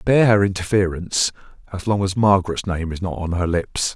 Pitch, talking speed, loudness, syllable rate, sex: 95 Hz, 230 wpm, -20 LUFS, 6.2 syllables/s, male